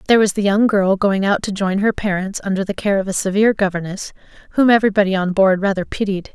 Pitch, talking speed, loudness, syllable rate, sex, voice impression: 200 Hz, 225 wpm, -17 LUFS, 6.4 syllables/s, female, feminine, slightly adult-like, slightly tensed, sincere, slightly lively